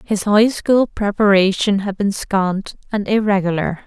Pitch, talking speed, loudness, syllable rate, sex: 200 Hz, 140 wpm, -17 LUFS, 4.2 syllables/s, female